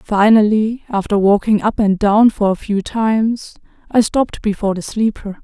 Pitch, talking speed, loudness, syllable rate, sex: 210 Hz, 165 wpm, -15 LUFS, 4.9 syllables/s, female